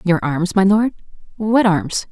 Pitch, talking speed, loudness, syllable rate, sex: 190 Hz, 140 wpm, -17 LUFS, 3.8 syllables/s, female